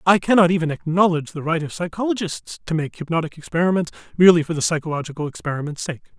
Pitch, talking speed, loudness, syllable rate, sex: 165 Hz, 175 wpm, -21 LUFS, 7.2 syllables/s, male